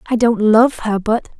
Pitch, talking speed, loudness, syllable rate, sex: 225 Hz, 215 wpm, -15 LUFS, 4.5 syllables/s, female